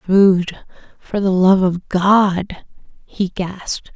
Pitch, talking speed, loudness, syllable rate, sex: 190 Hz, 120 wpm, -16 LUFS, 2.8 syllables/s, female